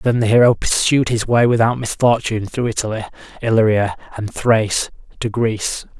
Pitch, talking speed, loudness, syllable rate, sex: 115 Hz, 150 wpm, -17 LUFS, 5.4 syllables/s, male